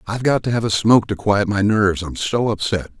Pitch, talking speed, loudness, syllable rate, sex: 105 Hz, 260 wpm, -18 LUFS, 6.1 syllables/s, male